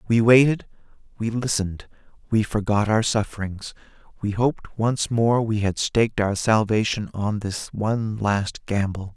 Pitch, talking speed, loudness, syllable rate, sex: 110 Hz, 145 wpm, -22 LUFS, 4.5 syllables/s, male